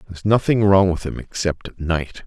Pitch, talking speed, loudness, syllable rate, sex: 90 Hz, 210 wpm, -19 LUFS, 5.3 syllables/s, male